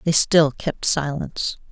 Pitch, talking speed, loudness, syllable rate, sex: 155 Hz, 140 wpm, -20 LUFS, 4.1 syllables/s, female